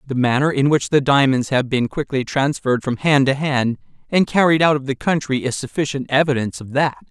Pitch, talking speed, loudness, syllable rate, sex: 135 Hz, 210 wpm, -18 LUFS, 5.6 syllables/s, male